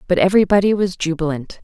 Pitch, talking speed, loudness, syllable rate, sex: 180 Hz, 145 wpm, -17 LUFS, 6.8 syllables/s, female